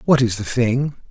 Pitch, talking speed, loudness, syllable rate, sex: 125 Hz, 220 wpm, -19 LUFS, 4.7 syllables/s, male